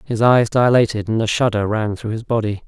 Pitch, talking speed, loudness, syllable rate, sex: 110 Hz, 225 wpm, -17 LUFS, 5.5 syllables/s, male